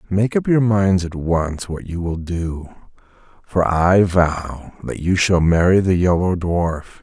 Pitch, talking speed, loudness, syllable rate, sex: 90 Hz, 170 wpm, -18 LUFS, 3.6 syllables/s, male